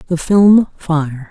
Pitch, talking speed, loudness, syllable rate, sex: 170 Hz, 140 wpm, -13 LUFS, 2.9 syllables/s, female